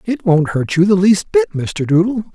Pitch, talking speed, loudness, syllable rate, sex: 175 Hz, 230 wpm, -15 LUFS, 4.9 syllables/s, male